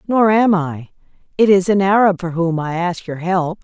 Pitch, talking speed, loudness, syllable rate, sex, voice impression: 180 Hz, 215 wpm, -16 LUFS, 4.7 syllables/s, female, slightly feminine, very gender-neutral, very middle-aged, slightly thick, slightly tensed, powerful, slightly bright, slightly soft, slightly muffled, fluent, raspy, slightly cool, slightly intellectual, slightly refreshing, sincere, very calm, slightly friendly, slightly reassuring, very unique, slightly elegant, very wild, slightly sweet, lively, kind, slightly modest